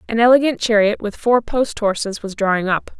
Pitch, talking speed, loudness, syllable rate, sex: 220 Hz, 200 wpm, -17 LUFS, 5.3 syllables/s, female